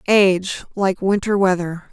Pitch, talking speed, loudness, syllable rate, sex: 190 Hz, 125 wpm, -18 LUFS, 4.3 syllables/s, female